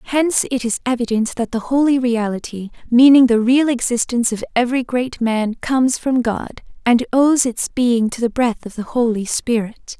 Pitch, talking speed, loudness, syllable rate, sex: 240 Hz, 180 wpm, -17 LUFS, 4.9 syllables/s, female